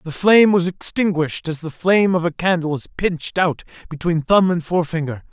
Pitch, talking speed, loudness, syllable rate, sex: 170 Hz, 190 wpm, -18 LUFS, 5.7 syllables/s, male